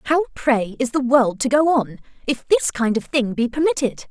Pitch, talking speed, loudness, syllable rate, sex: 250 Hz, 220 wpm, -19 LUFS, 4.9 syllables/s, female